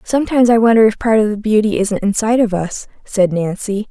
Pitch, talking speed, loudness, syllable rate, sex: 215 Hz, 215 wpm, -15 LUFS, 6.0 syllables/s, female